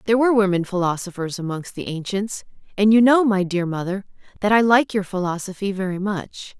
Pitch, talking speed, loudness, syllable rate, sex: 200 Hz, 180 wpm, -20 LUFS, 5.7 syllables/s, female